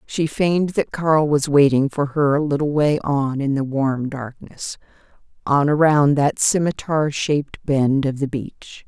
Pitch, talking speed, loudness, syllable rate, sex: 145 Hz, 160 wpm, -19 LUFS, 4.1 syllables/s, female